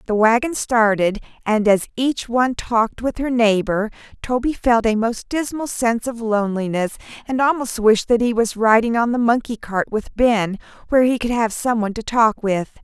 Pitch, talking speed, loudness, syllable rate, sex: 230 Hz, 190 wpm, -19 LUFS, 5.1 syllables/s, female